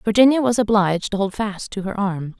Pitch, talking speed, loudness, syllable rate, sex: 205 Hz, 225 wpm, -20 LUFS, 5.7 syllables/s, female